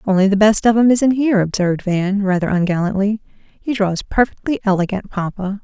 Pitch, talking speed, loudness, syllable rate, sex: 200 Hz, 170 wpm, -17 LUFS, 5.5 syllables/s, female